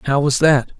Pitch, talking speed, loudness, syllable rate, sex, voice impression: 140 Hz, 225 wpm, -15 LUFS, 4.9 syllables/s, male, masculine, adult-like, slightly muffled, cool, slightly intellectual, sincere